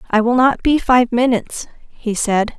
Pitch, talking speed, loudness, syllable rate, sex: 240 Hz, 185 wpm, -16 LUFS, 4.6 syllables/s, female